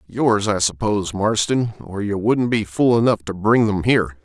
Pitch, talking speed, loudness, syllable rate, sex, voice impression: 105 Hz, 200 wpm, -19 LUFS, 4.8 syllables/s, male, masculine, adult-like, slightly thick, tensed, powerful, bright, clear, fluent, intellectual, slightly friendly, unique, wild, lively, intense, slightly light